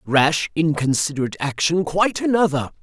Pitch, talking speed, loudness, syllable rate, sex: 160 Hz, 105 wpm, -20 LUFS, 5.5 syllables/s, male